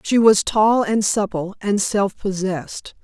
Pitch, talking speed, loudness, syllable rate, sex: 205 Hz, 160 wpm, -19 LUFS, 3.9 syllables/s, female